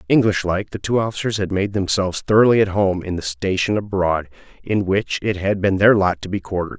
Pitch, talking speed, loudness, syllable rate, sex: 95 Hz, 220 wpm, -19 LUFS, 5.7 syllables/s, male